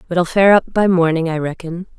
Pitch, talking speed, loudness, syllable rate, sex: 175 Hz, 210 wpm, -15 LUFS, 5.4 syllables/s, female